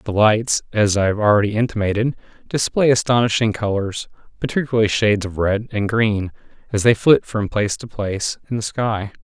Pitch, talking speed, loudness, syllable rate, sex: 110 Hz, 170 wpm, -19 LUFS, 5.5 syllables/s, male